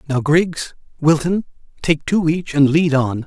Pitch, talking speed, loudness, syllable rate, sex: 155 Hz, 145 wpm, -17 LUFS, 4.0 syllables/s, male